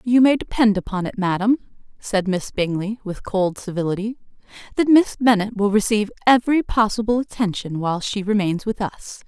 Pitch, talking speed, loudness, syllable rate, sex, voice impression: 210 Hz, 160 wpm, -20 LUFS, 5.4 syllables/s, female, very feminine, adult-like, slightly middle-aged, thin, slightly tensed, slightly weak, bright, hard, clear, fluent, slightly raspy, slightly cool, very intellectual, slightly refreshing, sincere, very calm, friendly, reassuring, very elegant, sweet, kind